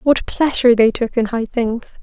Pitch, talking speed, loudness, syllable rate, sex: 240 Hz, 205 wpm, -16 LUFS, 4.8 syllables/s, female